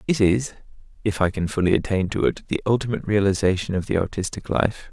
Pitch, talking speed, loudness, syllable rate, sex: 100 Hz, 195 wpm, -22 LUFS, 6.2 syllables/s, male